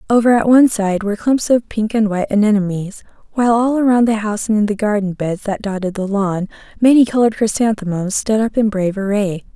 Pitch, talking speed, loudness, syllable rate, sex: 215 Hz, 205 wpm, -16 LUFS, 6.1 syllables/s, female